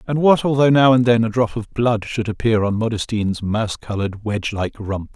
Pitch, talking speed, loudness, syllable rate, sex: 115 Hz, 220 wpm, -19 LUFS, 5.6 syllables/s, male